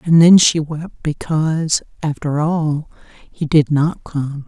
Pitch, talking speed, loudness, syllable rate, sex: 155 Hz, 150 wpm, -17 LUFS, 3.5 syllables/s, female